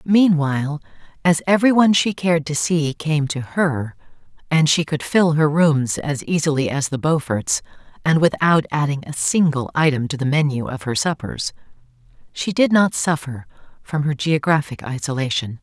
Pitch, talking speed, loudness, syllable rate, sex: 150 Hz, 160 wpm, -19 LUFS, 3.5 syllables/s, female